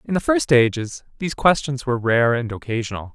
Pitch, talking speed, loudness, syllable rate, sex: 135 Hz, 190 wpm, -20 LUFS, 5.9 syllables/s, male